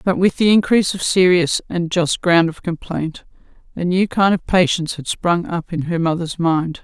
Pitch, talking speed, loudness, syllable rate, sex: 175 Hz, 200 wpm, -17 LUFS, 4.9 syllables/s, female